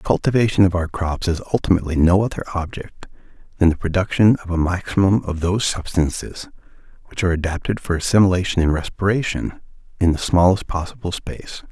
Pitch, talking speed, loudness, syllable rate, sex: 90 Hz, 160 wpm, -19 LUFS, 6.1 syllables/s, male